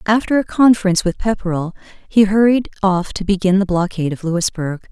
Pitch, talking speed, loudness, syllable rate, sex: 195 Hz, 170 wpm, -16 LUFS, 5.8 syllables/s, female